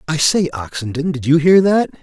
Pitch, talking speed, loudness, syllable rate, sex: 155 Hz, 205 wpm, -15 LUFS, 5.1 syllables/s, male